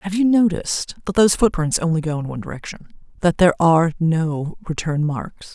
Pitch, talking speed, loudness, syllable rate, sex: 165 Hz, 175 wpm, -19 LUFS, 5.9 syllables/s, female